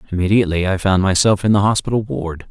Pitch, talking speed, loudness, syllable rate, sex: 95 Hz, 190 wpm, -16 LUFS, 6.6 syllables/s, male